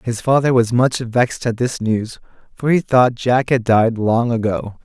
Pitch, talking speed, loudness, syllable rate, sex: 120 Hz, 200 wpm, -17 LUFS, 4.3 syllables/s, male